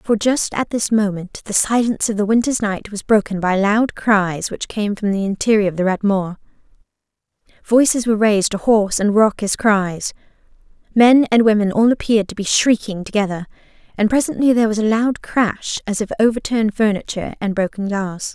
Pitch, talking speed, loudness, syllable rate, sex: 210 Hz, 175 wpm, -17 LUFS, 5.4 syllables/s, female